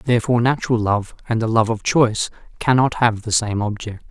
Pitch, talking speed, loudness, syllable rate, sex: 115 Hz, 190 wpm, -19 LUFS, 5.8 syllables/s, male